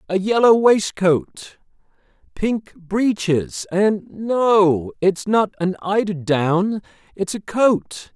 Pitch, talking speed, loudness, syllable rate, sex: 195 Hz, 105 wpm, -19 LUFS, 2.9 syllables/s, male